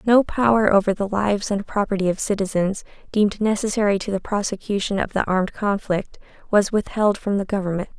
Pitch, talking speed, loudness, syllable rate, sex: 200 Hz, 175 wpm, -21 LUFS, 5.8 syllables/s, female